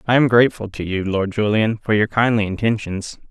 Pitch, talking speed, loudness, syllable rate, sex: 105 Hz, 200 wpm, -19 LUFS, 5.7 syllables/s, male